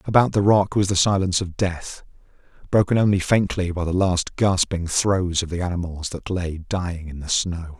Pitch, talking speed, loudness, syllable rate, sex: 90 Hz, 190 wpm, -21 LUFS, 5.1 syllables/s, male